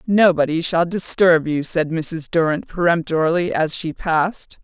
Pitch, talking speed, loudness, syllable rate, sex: 165 Hz, 140 wpm, -18 LUFS, 4.5 syllables/s, female